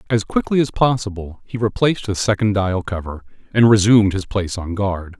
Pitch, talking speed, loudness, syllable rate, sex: 105 Hz, 185 wpm, -18 LUFS, 5.6 syllables/s, male